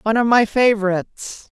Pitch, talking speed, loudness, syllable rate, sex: 220 Hz, 150 wpm, -17 LUFS, 5.7 syllables/s, female